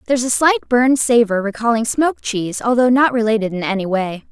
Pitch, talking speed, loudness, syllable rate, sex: 230 Hz, 195 wpm, -16 LUFS, 6.3 syllables/s, female